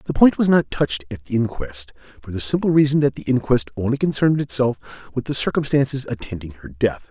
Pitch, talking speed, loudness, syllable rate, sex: 125 Hz, 205 wpm, -20 LUFS, 6.2 syllables/s, male